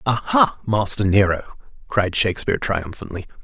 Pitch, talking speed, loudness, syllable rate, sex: 105 Hz, 105 wpm, -20 LUFS, 5.3 syllables/s, male